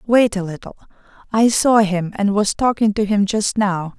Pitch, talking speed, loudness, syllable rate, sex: 205 Hz, 195 wpm, -17 LUFS, 4.6 syllables/s, female